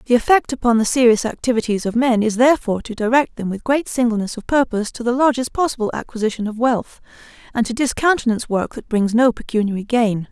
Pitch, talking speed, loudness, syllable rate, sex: 235 Hz, 200 wpm, -18 LUFS, 6.4 syllables/s, female